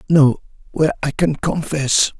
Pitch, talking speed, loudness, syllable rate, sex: 150 Hz, 135 wpm, -18 LUFS, 4.5 syllables/s, male